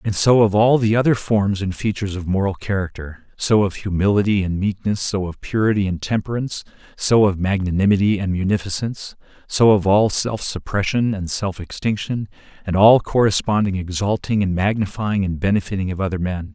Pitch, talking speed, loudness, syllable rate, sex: 100 Hz, 165 wpm, -19 LUFS, 5.5 syllables/s, male